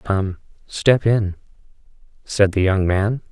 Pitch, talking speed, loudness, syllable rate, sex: 100 Hz, 125 wpm, -19 LUFS, 3.4 syllables/s, male